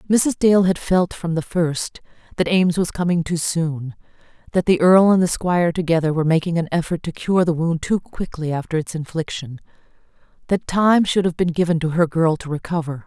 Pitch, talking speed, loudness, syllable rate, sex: 170 Hz, 200 wpm, -19 LUFS, 5.4 syllables/s, female